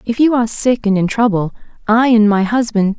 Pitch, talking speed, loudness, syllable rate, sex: 220 Hz, 220 wpm, -14 LUFS, 5.6 syllables/s, female